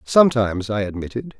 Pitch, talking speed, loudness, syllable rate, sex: 110 Hz, 130 wpm, -20 LUFS, 6.3 syllables/s, male